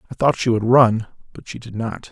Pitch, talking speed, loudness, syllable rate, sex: 115 Hz, 255 wpm, -18 LUFS, 5.6 syllables/s, male